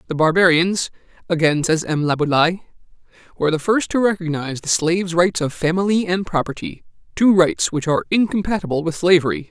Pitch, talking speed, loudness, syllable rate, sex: 170 Hz, 150 wpm, -18 LUFS, 5.8 syllables/s, male